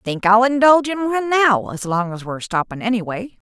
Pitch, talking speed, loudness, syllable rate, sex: 225 Hz, 205 wpm, -17 LUFS, 5.6 syllables/s, female